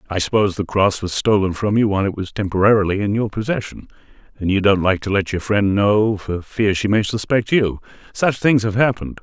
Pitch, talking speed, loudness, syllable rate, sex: 105 Hz, 220 wpm, -18 LUFS, 5.7 syllables/s, male